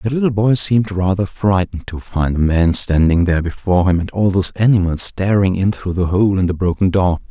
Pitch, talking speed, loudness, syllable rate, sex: 95 Hz, 220 wpm, -16 LUFS, 5.7 syllables/s, male